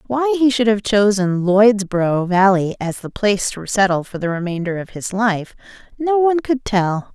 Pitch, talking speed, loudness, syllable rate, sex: 210 Hz, 185 wpm, -17 LUFS, 4.8 syllables/s, female